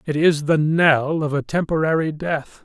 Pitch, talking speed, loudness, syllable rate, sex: 155 Hz, 180 wpm, -19 LUFS, 4.4 syllables/s, male